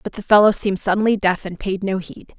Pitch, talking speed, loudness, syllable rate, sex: 195 Hz, 250 wpm, -18 LUFS, 6.0 syllables/s, female